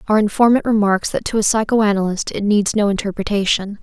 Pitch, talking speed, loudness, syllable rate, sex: 205 Hz, 175 wpm, -17 LUFS, 5.8 syllables/s, female